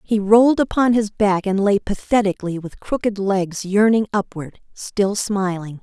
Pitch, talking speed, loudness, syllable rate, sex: 205 Hz, 155 wpm, -19 LUFS, 4.5 syllables/s, female